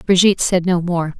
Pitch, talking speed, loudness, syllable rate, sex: 175 Hz, 200 wpm, -16 LUFS, 5.8 syllables/s, female